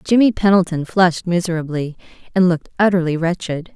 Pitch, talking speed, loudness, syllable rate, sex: 175 Hz, 130 wpm, -17 LUFS, 6.0 syllables/s, female